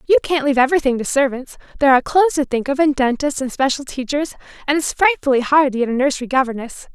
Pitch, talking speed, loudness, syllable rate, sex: 275 Hz, 215 wpm, -17 LUFS, 7.1 syllables/s, female